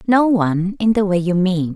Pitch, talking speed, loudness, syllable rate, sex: 190 Hz, 205 wpm, -17 LUFS, 5.1 syllables/s, female